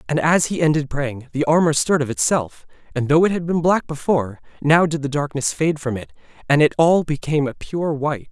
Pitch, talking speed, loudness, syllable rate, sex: 150 Hz, 225 wpm, -19 LUFS, 5.7 syllables/s, male